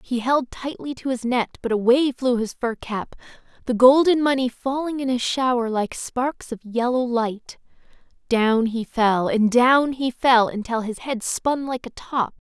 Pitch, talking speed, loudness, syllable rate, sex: 245 Hz, 180 wpm, -21 LUFS, 4.2 syllables/s, female